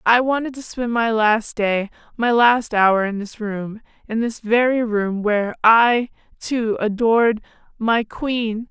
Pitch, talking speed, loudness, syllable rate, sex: 225 Hz, 160 wpm, -19 LUFS, 3.8 syllables/s, female